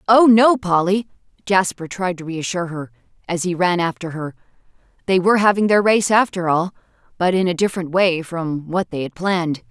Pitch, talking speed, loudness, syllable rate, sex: 180 Hz, 185 wpm, -18 LUFS, 5.4 syllables/s, female